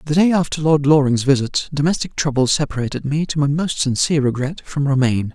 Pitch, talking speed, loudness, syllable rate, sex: 145 Hz, 190 wpm, -18 LUFS, 6.0 syllables/s, male